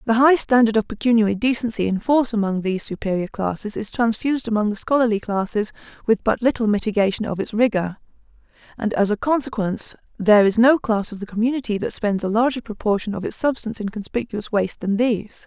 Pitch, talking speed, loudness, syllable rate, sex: 220 Hz, 190 wpm, -21 LUFS, 6.3 syllables/s, female